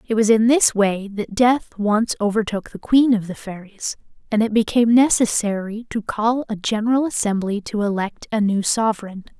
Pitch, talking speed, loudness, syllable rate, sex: 215 Hz, 180 wpm, -19 LUFS, 5.0 syllables/s, female